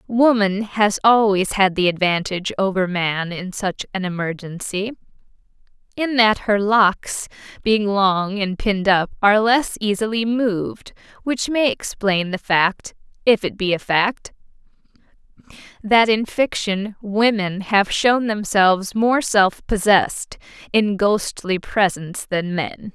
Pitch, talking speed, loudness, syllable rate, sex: 205 Hz, 125 wpm, -19 LUFS, 3.9 syllables/s, female